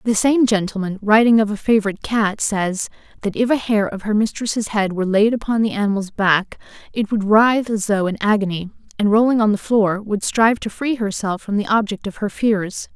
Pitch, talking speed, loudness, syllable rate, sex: 210 Hz, 215 wpm, -18 LUFS, 5.4 syllables/s, female